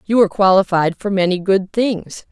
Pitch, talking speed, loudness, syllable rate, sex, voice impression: 195 Hz, 180 wpm, -16 LUFS, 5.0 syllables/s, female, feminine, middle-aged, tensed, powerful, hard, clear, slightly halting, intellectual, slightly friendly, lively, slightly strict